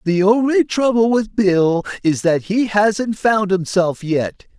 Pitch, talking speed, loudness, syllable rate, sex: 200 Hz, 155 wpm, -17 LUFS, 3.6 syllables/s, male